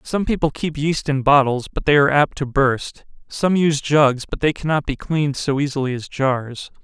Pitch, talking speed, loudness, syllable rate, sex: 145 Hz, 200 wpm, -19 LUFS, 5.0 syllables/s, male